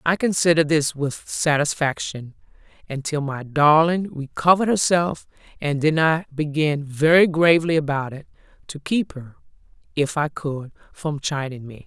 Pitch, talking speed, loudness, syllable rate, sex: 150 Hz, 135 wpm, -21 LUFS, 4.7 syllables/s, female